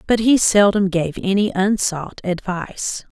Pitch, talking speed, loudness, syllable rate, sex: 195 Hz, 135 wpm, -18 LUFS, 4.2 syllables/s, female